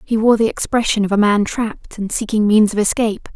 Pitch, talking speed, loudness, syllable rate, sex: 215 Hz, 235 wpm, -16 LUFS, 5.9 syllables/s, female